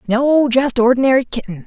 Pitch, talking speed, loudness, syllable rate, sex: 250 Hz, 145 wpm, -14 LUFS, 5.3 syllables/s, female